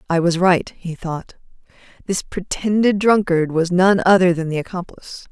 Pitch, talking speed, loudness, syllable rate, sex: 180 Hz, 160 wpm, -18 LUFS, 4.8 syllables/s, female